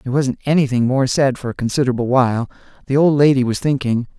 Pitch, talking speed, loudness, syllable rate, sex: 130 Hz, 200 wpm, -17 LUFS, 6.8 syllables/s, male